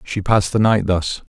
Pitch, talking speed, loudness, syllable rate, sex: 100 Hz, 225 wpm, -18 LUFS, 5.2 syllables/s, male